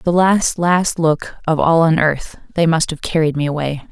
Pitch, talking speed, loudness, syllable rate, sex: 160 Hz, 200 wpm, -16 LUFS, 4.5 syllables/s, female